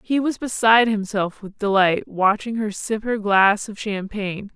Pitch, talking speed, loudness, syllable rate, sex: 210 Hz, 170 wpm, -20 LUFS, 4.5 syllables/s, female